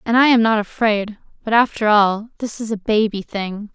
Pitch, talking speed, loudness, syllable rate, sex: 215 Hz, 210 wpm, -18 LUFS, 4.9 syllables/s, female